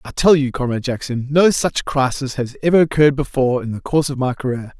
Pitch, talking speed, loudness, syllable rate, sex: 135 Hz, 225 wpm, -18 LUFS, 6.4 syllables/s, male